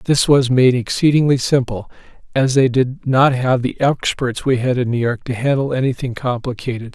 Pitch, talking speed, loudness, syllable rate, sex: 130 Hz, 180 wpm, -17 LUFS, 5.0 syllables/s, male